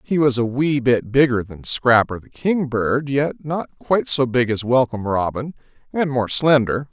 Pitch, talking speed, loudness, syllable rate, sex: 130 Hz, 180 wpm, -19 LUFS, 4.7 syllables/s, male